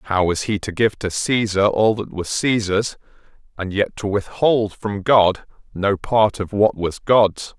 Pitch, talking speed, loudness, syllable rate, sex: 105 Hz, 180 wpm, -19 LUFS, 3.9 syllables/s, male